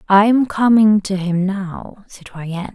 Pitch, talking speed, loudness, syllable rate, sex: 200 Hz, 155 wpm, -16 LUFS, 4.1 syllables/s, female